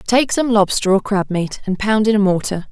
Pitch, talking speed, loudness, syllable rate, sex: 205 Hz, 245 wpm, -17 LUFS, 5.1 syllables/s, female